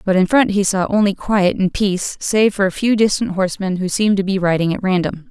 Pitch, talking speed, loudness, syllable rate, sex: 195 Hz, 250 wpm, -17 LUFS, 5.8 syllables/s, female